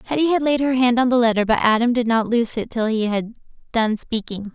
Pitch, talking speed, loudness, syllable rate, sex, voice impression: 235 Hz, 250 wpm, -19 LUFS, 6.0 syllables/s, female, very feminine, slightly young, slightly adult-like, very thin, tensed, powerful, very bright, hard, very clear, very fluent, very cute, slightly intellectual, very refreshing, sincere, slightly calm, very friendly, very reassuring, slightly unique, elegant, sweet, very lively, intense, slightly sharp